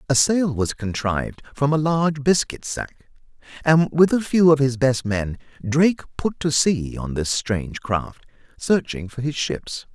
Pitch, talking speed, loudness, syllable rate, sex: 140 Hz, 175 wpm, -21 LUFS, 4.3 syllables/s, male